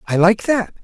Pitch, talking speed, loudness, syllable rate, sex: 200 Hz, 215 wpm, -16 LUFS, 4.7 syllables/s, male